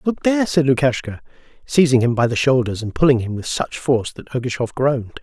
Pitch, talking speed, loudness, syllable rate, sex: 130 Hz, 205 wpm, -18 LUFS, 6.1 syllables/s, male